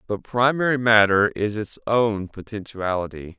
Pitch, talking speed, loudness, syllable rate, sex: 110 Hz, 125 wpm, -21 LUFS, 4.4 syllables/s, male